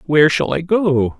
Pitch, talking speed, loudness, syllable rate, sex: 145 Hz, 200 wpm, -16 LUFS, 4.8 syllables/s, male